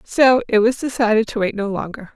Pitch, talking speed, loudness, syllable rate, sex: 225 Hz, 225 wpm, -18 LUFS, 5.5 syllables/s, female